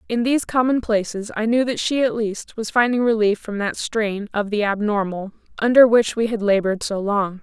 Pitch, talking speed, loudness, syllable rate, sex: 220 Hz, 200 wpm, -20 LUFS, 5.2 syllables/s, female